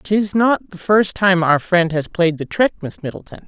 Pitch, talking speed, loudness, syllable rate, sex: 180 Hz, 225 wpm, -17 LUFS, 4.4 syllables/s, female